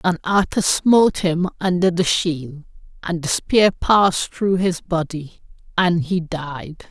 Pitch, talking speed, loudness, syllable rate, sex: 175 Hz, 150 wpm, -19 LUFS, 3.8 syllables/s, female